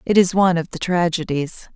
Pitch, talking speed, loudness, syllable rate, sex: 175 Hz, 205 wpm, -19 LUFS, 6.2 syllables/s, female